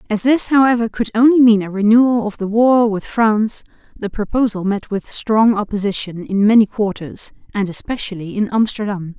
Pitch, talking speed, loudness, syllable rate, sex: 215 Hz, 170 wpm, -16 LUFS, 5.2 syllables/s, female